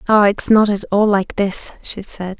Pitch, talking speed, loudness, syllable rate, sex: 200 Hz, 225 wpm, -16 LUFS, 4.3 syllables/s, female